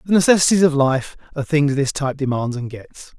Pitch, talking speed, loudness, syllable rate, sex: 145 Hz, 205 wpm, -18 LUFS, 6.1 syllables/s, male